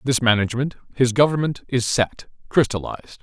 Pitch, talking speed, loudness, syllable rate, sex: 125 Hz, 130 wpm, -21 LUFS, 5.6 syllables/s, male